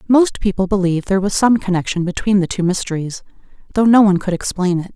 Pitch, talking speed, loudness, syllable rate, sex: 190 Hz, 205 wpm, -16 LUFS, 6.6 syllables/s, female